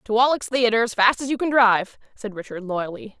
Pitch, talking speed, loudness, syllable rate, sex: 230 Hz, 225 wpm, -20 LUFS, 5.8 syllables/s, female